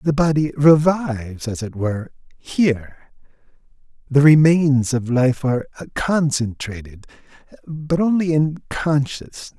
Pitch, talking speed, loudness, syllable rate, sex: 140 Hz, 105 wpm, -18 LUFS, 4.2 syllables/s, male